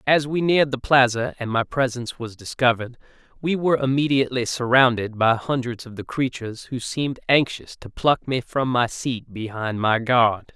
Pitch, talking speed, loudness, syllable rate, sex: 125 Hz, 175 wpm, -22 LUFS, 5.2 syllables/s, male